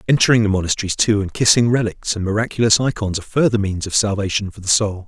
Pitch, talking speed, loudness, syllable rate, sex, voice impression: 105 Hz, 200 wpm, -17 LUFS, 6.5 syllables/s, male, very masculine, very middle-aged, very thick, very tensed, very powerful, bright, soft, slightly muffled, fluent, slightly raspy, very cool, very intellectual, refreshing, very sincere, calm, very mature, friendly, unique, elegant, wild, very sweet, lively, kind, slightly intense